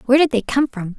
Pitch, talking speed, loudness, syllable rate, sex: 250 Hz, 305 wpm, -18 LUFS, 7.1 syllables/s, female